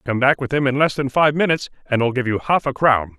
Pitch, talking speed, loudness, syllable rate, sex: 135 Hz, 300 wpm, -18 LUFS, 6.4 syllables/s, male